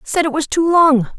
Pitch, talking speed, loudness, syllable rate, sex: 300 Hz, 255 wpm, -14 LUFS, 5.0 syllables/s, female